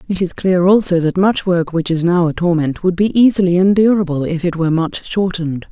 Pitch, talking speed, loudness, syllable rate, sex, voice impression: 175 Hz, 220 wpm, -15 LUFS, 5.6 syllables/s, female, feminine, adult-like, slightly soft, slightly cool